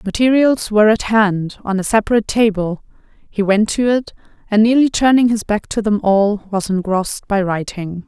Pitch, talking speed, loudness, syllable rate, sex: 210 Hz, 180 wpm, -16 LUFS, 5.0 syllables/s, female